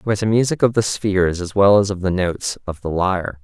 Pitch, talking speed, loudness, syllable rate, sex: 100 Hz, 280 wpm, -18 LUFS, 6.3 syllables/s, male